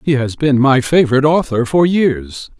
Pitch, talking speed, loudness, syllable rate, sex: 135 Hz, 185 wpm, -13 LUFS, 4.9 syllables/s, male